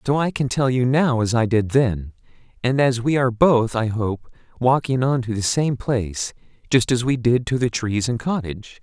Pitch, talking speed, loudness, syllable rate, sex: 125 Hz, 220 wpm, -20 LUFS, 5.0 syllables/s, male